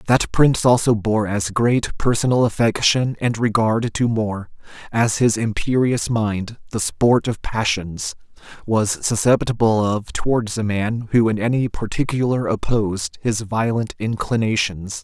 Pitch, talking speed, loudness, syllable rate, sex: 110 Hz, 135 wpm, -19 LUFS, 4.2 syllables/s, male